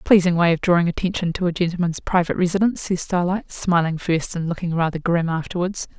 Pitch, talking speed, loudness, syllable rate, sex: 175 Hz, 190 wpm, -21 LUFS, 6.2 syllables/s, female